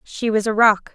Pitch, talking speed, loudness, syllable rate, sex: 215 Hz, 255 wpm, -17 LUFS, 4.7 syllables/s, female